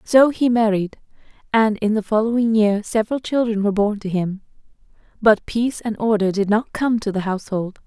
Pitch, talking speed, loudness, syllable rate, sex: 215 Hz, 185 wpm, -19 LUFS, 5.4 syllables/s, female